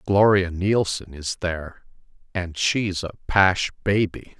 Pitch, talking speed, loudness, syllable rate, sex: 90 Hz, 125 wpm, -22 LUFS, 3.9 syllables/s, male